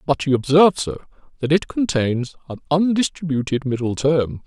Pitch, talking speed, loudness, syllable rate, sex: 150 Hz, 150 wpm, -19 LUFS, 5.3 syllables/s, male